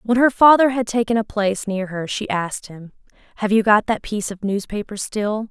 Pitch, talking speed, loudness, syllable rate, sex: 210 Hz, 220 wpm, -19 LUFS, 5.5 syllables/s, female